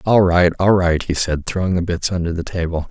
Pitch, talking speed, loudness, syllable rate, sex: 90 Hz, 250 wpm, -18 LUFS, 5.5 syllables/s, male